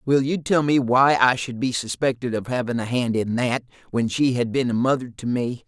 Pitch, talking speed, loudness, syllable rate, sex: 125 Hz, 245 wpm, -22 LUFS, 5.2 syllables/s, male